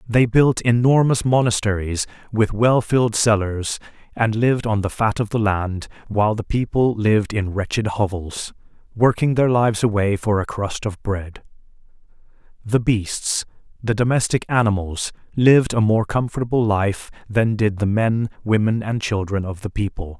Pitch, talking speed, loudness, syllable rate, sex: 110 Hz, 155 wpm, -20 LUFS, 4.7 syllables/s, male